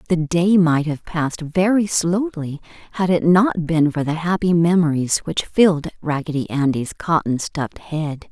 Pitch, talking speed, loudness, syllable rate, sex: 165 Hz, 160 wpm, -19 LUFS, 4.5 syllables/s, female